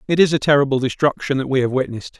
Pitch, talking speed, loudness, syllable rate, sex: 140 Hz, 245 wpm, -18 LUFS, 7.4 syllables/s, male